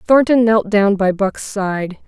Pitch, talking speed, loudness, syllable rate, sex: 205 Hz, 175 wpm, -16 LUFS, 3.6 syllables/s, female